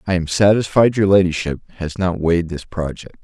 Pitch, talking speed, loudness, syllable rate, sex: 90 Hz, 185 wpm, -18 LUFS, 5.6 syllables/s, male